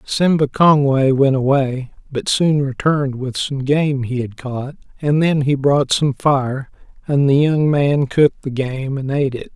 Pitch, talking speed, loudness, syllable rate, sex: 140 Hz, 180 wpm, -17 LUFS, 4.2 syllables/s, male